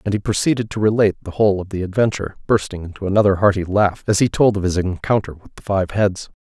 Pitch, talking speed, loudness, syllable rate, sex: 100 Hz, 225 wpm, -18 LUFS, 6.7 syllables/s, male